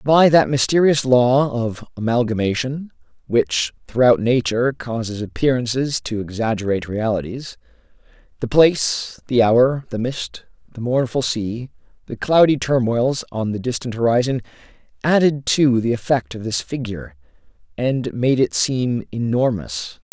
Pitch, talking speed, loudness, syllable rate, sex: 120 Hz, 125 wpm, -19 LUFS, 4.5 syllables/s, male